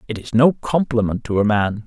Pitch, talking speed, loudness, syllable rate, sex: 115 Hz, 225 wpm, -18 LUFS, 5.3 syllables/s, male